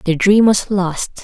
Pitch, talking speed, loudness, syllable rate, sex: 190 Hz, 195 wpm, -14 LUFS, 3.6 syllables/s, female